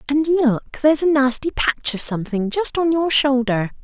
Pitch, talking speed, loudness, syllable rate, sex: 275 Hz, 190 wpm, -18 LUFS, 4.8 syllables/s, female